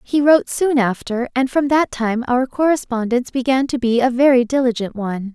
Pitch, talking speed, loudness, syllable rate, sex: 250 Hz, 190 wpm, -17 LUFS, 5.4 syllables/s, female